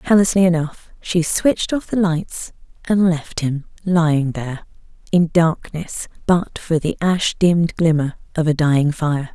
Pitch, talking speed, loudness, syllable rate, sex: 165 Hz, 155 wpm, -18 LUFS, 4.3 syllables/s, female